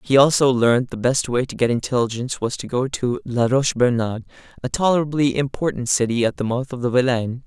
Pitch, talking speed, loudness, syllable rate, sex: 125 Hz, 210 wpm, -20 LUFS, 5.9 syllables/s, male